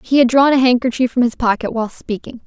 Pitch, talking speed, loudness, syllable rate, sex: 245 Hz, 245 wpm, -16 LUFS, 6.4 syllables/s, female